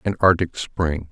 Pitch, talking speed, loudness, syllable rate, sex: 85 Hz, 160 wpm, -21 LUFS, 4.1 syllables/s, male